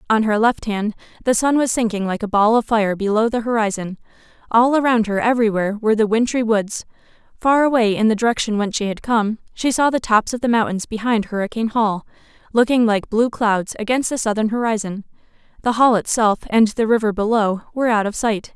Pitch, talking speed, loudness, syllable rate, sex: 220 Hz, 200 wpm, -18 LUFS, 5.8 syllables/s, female